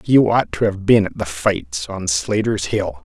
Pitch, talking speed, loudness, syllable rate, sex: 105 Hz, 210 wpm, -18 LUFS, 4.1 syllables/s, male